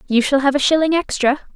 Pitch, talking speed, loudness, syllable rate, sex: 280 Hz, 230 wpm, -17 LUFS, 6.5 syllables/s, female